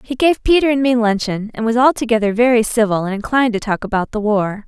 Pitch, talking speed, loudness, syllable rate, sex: 230 Hz, 230 wpm, -16 LUFS, 6.2 syllables/s, female